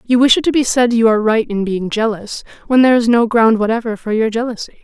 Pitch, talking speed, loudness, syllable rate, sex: 225 Hz, 260 wpm, -14 LUFS, 6.3 syllables/s, female